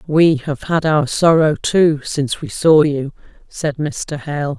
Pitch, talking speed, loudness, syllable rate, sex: 150 Hz, 170 wpm, -16 LUFS, 3.7 syllables/s, female